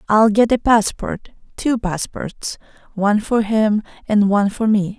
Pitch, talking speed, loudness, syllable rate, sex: 215 Hz, 155 wpm, -18 LUFS, 4.2 syllables/s, female